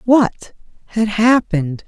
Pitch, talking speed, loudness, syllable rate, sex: 210 Hz, 95 wpm, -16 LUFS, 3.7 syllables/s, female